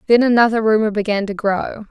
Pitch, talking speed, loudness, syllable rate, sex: 215 Hz, 190 wpm, -16 LUFS, 5.8 syllables/s, female